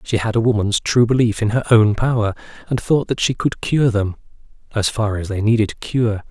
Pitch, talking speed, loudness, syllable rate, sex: 110 Hz, 210 wpm, -18 LUFS, 5.3 syllables/s, male